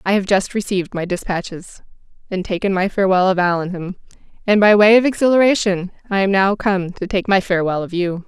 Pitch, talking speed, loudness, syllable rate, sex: 190 Hz, 195 wpm, -17 LUFS, 6.0 syllables/s, female